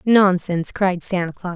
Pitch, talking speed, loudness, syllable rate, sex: 185 Hz, 155 wpm, -19 LUFS, 4.7 syllables/s, female